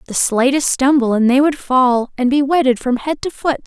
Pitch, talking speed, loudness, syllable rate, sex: 265 Hz, 230 wpm, -15 LUFS, 5.0 syllables/s, female